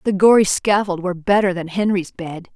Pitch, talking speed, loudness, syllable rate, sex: 190 Hz, 190 wpm, -17 LUFS, 5.5 syllables/s, female